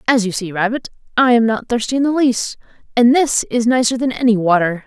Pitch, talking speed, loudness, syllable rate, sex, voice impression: 235 Hz, 220 wpm, -16 LUFS, 5.8 syllables/s, female, feminine, adult-like, slightly muffled, slightly cool, calm